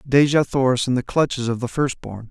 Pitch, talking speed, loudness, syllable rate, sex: 130 Hz, 235 wpm, -20 LUFS, 5.5 syllables/s, male